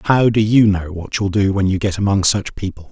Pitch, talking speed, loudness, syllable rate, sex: 100 Hz, 265 wpm, -16 LUFS, 5.6 syllables/s, male